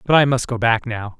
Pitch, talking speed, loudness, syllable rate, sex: 120 Hz, 300 wpm, -18 LUFS, 5.6 syllables/s, male